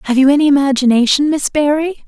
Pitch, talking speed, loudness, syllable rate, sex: 280 Hz, 175 wpm, -13 LUFS, 6.4 syllables/s, female